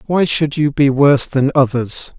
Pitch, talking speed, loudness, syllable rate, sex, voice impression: 140 Hz, 190 wpm, -14 LUFS, 4.6 syllables/s, male, very masculine, very adult-like, middle-aged, thick, tensed, slightly powerful, slightly dark, slightly muffled, fluent, very cool, very intellectual, slightly refreshing, sincere, calm, mature, friendly, reassuring, unique, elegant, slightly wild, sweet, lively, kind